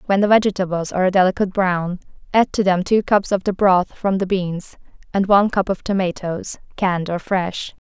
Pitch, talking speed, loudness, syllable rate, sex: 190 Hz, 200 wpm, -19 LUFS, 5.3 syllables/s, female